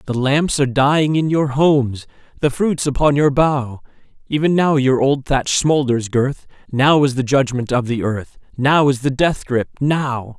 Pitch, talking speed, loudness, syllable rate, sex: 135 Hz, 185 wpm, -17 LUFS, 4.4 syllables/s, male